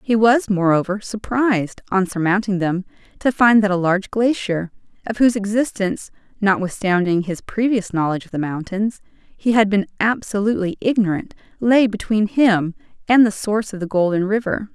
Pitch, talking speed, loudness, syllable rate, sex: 205 Hz, 155 wpm, -19 LUFS, 5.3 syllables/s, female